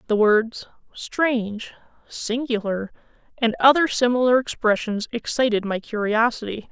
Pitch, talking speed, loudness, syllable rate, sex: 230 Hz, 100 wpm, -21 LUFS, 4.4 syllables/s, female